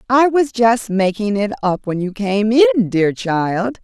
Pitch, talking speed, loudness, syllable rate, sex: 215 Hz, 190 wpm, -16 LUFS, 3.8 syllables/s, female